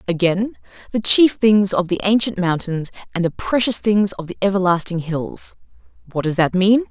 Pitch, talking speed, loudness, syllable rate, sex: 195 Hz, 175 wpm, -18 LUFS, 4.9 syllables/s, female